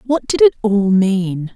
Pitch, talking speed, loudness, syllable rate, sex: 215 Hz, 195 wpm, -15 LUFS, 3.6 syllables/s, female